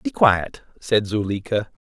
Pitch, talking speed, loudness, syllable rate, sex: 105 Hz, 130 wpm, -21 LUFS, 3.9 syllables/s, male